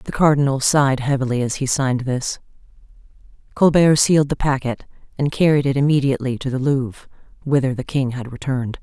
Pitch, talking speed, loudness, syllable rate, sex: 135 Hz, 165 wpm, -19 LUFS, 6.0 syllables/s, female